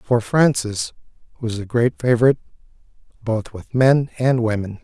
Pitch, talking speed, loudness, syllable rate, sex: 120 Hz, 135 wpm, -19 LUFS, 4.8 syllables/s, male